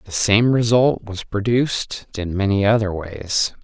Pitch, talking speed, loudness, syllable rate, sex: 105 Hz, 150 wpm, -19 LUFS, 4.2 syllables/s, male